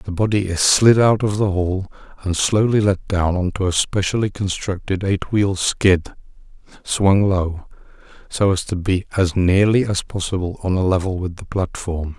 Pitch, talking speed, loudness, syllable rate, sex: 95 Hz, 170 wpm, -19 LUFS, 4.5 syllables/s, male